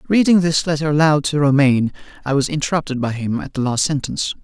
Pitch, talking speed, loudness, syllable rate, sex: 145 Hz, 205 wpm, -18 LUFS, 6.4 syllables/s, male